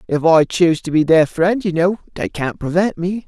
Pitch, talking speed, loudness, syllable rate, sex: 170 Hz, 240 wpm, -16 LUFS, 5.1 syllables/s, male